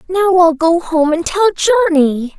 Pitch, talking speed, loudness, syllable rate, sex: 340 Hz, 175 wpm, -13 LUFS, 5.3 syllables/s, female